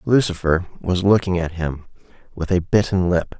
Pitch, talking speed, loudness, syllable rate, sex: 90 Hz, 160 wpm, -20 LUFS, 4.9 syllables/s, male